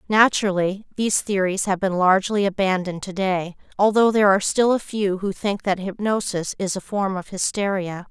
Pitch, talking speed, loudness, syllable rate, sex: 195 Hz, 170 wpm, -21 LUFS, 5.4 syllables/s, female